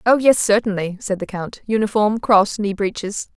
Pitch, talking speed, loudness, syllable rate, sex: 210 Hz, 175 wpm, -19 LUFS, 4.8 syllables/s, female